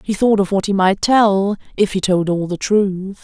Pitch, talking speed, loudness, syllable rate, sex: 195 Hz, 225 wpm, -16 LUFS, 4.4 syllables/s, female